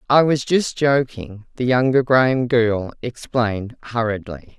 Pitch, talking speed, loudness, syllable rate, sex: 120 Hz, 130 wpm, -19 LUFS, 4.2 syllables/s, female